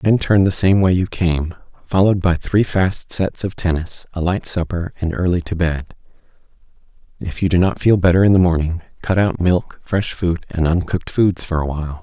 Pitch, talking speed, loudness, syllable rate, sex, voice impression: 90 Hz, 205 wpm, -18 LUFS, 5.2 syllables/s, male, masculine, adult-like, slightly refreshing, sincere, calm